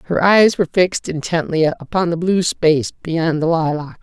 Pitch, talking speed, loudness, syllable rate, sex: 170 Hz, 180 wpm, -17 LUFS, 5.1 syllables/s, female